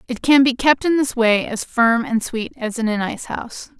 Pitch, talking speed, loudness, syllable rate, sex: 240 Hz, 255 wpm, -18 LUFS, 5.1 syllables/s, female